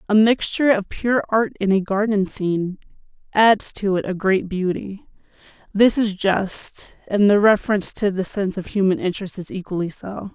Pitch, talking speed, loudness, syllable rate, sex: 200 Hz, 175 wpm, -20 LUFS, 5.0 syllables/s, female